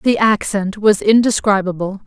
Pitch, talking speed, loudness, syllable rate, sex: 210 Hz, 115 wpm, -15 LUFS, 4.5 syllables/s, female